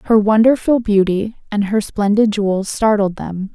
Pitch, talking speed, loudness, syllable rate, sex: 210 Hz, 150 wpm, -16 LUFS, 4.7 syllables/s, female